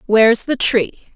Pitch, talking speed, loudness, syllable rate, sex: 215 Hz, 155 wpm, -15 LUFS, 4.2 syllables/s, female